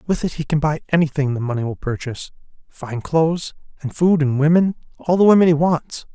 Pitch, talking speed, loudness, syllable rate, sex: 155 Hz, 205 wpm, -18 LUFS, 5.8 syllables/s, male